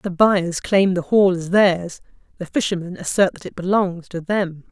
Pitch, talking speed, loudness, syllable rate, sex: 185 Hz, 190 wpm, -19 LUFS, 4.5 syllables/s, female